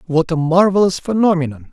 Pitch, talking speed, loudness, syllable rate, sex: 170 Hz, 140 wpm, -15 LUFS, 5.8 syllables/s, male